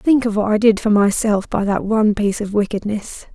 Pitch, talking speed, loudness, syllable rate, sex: 210 Hz, 235 wpm, -17 LUFS, 5.5 syllables/s, female